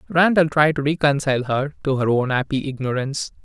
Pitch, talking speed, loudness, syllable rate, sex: 140 Hz, 175 wpm, -20 LUFS, 5.8 syllables/s, male